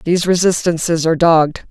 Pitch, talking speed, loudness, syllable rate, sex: 170 Hz, 140 wpm, -14 LUFS, 6.3 syllables/s, female